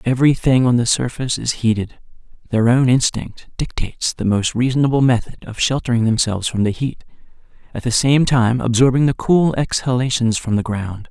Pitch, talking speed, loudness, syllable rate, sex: 120 Hz, 165 wpm, -17 LUFS, 5.4 syllables/s, male